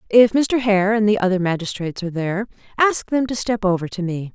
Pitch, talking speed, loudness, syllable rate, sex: 205 Hz, 220 wpm, -19 LUFS, 6.0 syllables/s, female